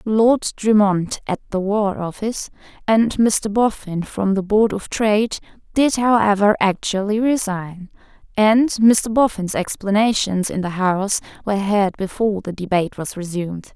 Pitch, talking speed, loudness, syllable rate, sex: 205 Hz, 140 wpm, -19 LUFS, 4.5 syllables/s, female